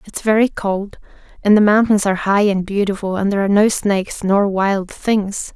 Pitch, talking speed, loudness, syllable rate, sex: 200 Hz, 195 wpm, -16 LUFS, 5.2 syllables/s, female